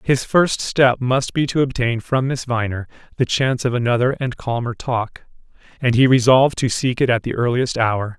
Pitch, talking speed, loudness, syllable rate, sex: 125 Hz, 200 wpm, -18 LUFS, 5.0 syllables/s, male